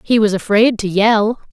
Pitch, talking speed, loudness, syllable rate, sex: 215 Hz, 195 wpm, -14 LUFS, 4.5 syllables/s, female